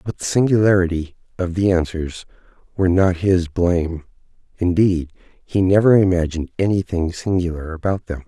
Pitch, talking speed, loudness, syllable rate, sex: 90 Hz, 130 wpm, -19 LUFS, 5.2 syllables/s, male